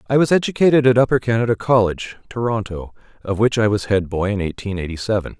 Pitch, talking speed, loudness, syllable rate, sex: 110 Hz, 200 wpm, -18 LUFS, 6.4 syllables/s, male